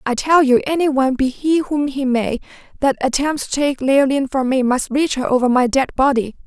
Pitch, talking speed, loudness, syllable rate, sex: 270 Hz, 225 wpm, -17 LUFS, 5.4 syllables/s, female